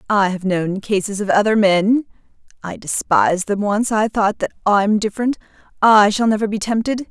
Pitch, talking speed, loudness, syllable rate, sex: 205 Hz, 170 wpm, -17 LUFS, 5.0 syllables/s, female